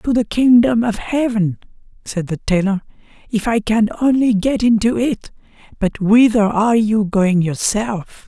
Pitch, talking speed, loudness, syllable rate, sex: 220 Hz, 145 wpm, -16 LUFS, 4.4 syllables/s, male